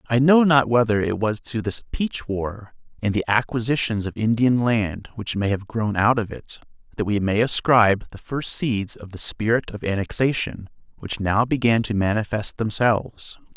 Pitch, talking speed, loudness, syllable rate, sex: 110 Hz, 180 wpm, -22 LUFS, 4.7 syllables/s, male